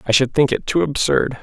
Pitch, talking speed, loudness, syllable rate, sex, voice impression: 135 Hz, 250 wpm, -18 LUFS, 5.3 syllables/s, male, masculine, adult-like, tensed, slightly powerful, bright, clear, cool, intellectual, refreshing, calm, friendly, wild, lively, kind